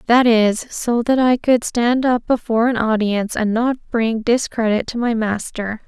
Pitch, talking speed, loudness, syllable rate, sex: 230 Hz, 185 wpm, -18 LUFS, 4.5 syllables/s, female